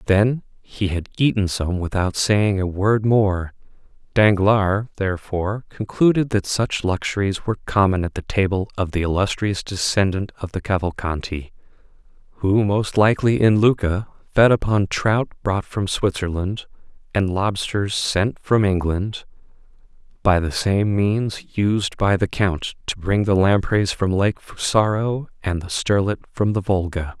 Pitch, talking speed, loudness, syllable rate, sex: 100 Hz, 145 wpm, -20 LUFS, 4.3 syllables/s, male